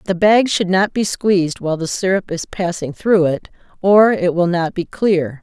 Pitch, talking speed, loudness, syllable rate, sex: 185 Hz, 210 wpm, -16 LUFS, 4.6 syllables/s, female